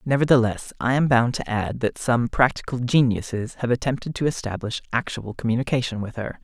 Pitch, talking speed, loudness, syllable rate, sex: 120 Hz, 170 wpm, -23 LUFS, 5.5 syllables/s, male